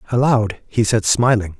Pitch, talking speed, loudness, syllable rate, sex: 110 Hz, 150 wpm, -17 LUFS, 4.5 syllables/s, male